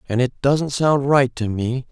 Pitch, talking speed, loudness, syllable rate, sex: 130 Hz, 220 wpm, -19 LUFS, 4.2 syllables/s, male